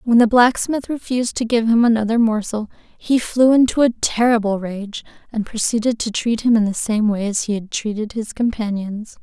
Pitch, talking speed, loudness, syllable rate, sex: 225 Hz, 195 wpm, -18 LUFS, 5.2 syllables/s, female